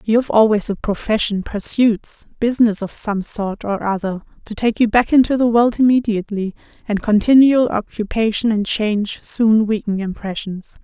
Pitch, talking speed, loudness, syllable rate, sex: 215 Hz, 155 wpm, -17 LUFS, 4.9 syllables/s, female